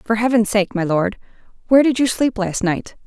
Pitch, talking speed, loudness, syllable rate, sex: 220 Hz, 215 wpm, -18 LUFS, 5.4 syllables/s, female